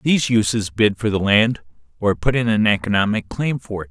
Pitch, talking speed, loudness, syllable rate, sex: 105 Hz, 215 wpm, -19 LUFS, 5.5 syllables/s, male